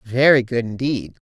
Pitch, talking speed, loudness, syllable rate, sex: 125 Hz, 140 wpm, -19 LUFS, 4.6 syllables/s, female